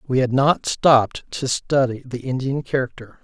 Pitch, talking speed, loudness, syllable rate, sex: 130 Hz, 165 wpm, -20 LUFS, 4.6 syllables/s, male